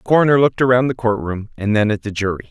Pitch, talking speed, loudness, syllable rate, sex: 115 Hz, 265 wpm, -17 LUFS, 7.3 syllables/s, male